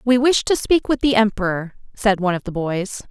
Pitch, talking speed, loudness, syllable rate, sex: 215 Hz, 230 wpm, -19 LUFS, 5.4 syllables/s, female